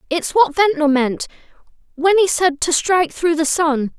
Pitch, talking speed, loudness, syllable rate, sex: 320 Hz, 180 wpm, -16 LUFS, 4.6 syllables/s, female